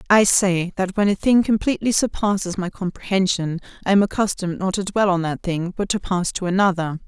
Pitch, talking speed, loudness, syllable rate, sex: 190 Hz, 205 wpm, -20 LUFS, 5.7 syllables/s, female